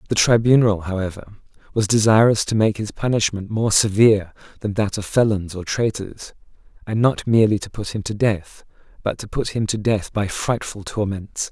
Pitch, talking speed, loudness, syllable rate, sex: 105 Hz, 175 wpm, -20 LUFS, 5.2 syllables/s, male